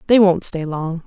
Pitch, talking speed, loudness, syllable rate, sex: 175 Hz, 225 wpm, -17 LUFS, 4.5 syllables/s, female